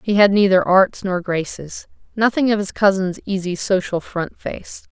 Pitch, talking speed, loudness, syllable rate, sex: 190 Hz, 170 wpm, -18 LUFS, 4.5 syllables/s, female